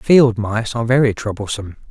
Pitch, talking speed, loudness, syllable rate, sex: 115 Hz, 160 wpm, -17 LUFS, 5.7 syllables/s, male